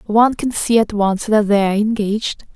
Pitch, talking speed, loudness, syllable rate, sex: 215 Hz, 190 wpm, -16 LUFS, 5.2 syllables/s, female